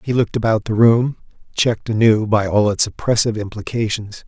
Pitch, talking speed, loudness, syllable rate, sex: 110 Hz, 170 wpm, -17 LUFS, 5.8 syllables/s, male